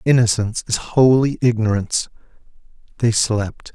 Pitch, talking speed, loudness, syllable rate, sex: 115 Hz, 95 wpm, -18 LUFS, 4.9 syllables/s, male